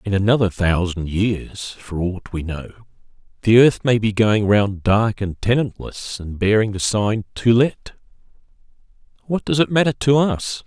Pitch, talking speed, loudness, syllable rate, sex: 110 Hz, 165 wpm, -19 LUFS, 4.2 syllables/s, male